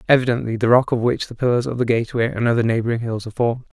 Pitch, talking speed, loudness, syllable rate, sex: 120 Hz, 255 wpm, -20 LUFS, 7.8 syllables/s, male